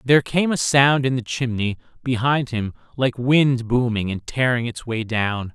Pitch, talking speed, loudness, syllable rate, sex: 125 Hz, 185 wpm, -20 LUFS, 4.4 syllables/s, male